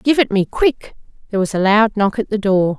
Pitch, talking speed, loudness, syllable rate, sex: 210 Hz, 260 wpm, -16 LUFS, 5.6 syllables/s, female